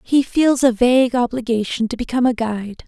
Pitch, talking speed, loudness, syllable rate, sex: 240 Hz, 190 wpm, -18 LUFS, 6.0 syllables/s, female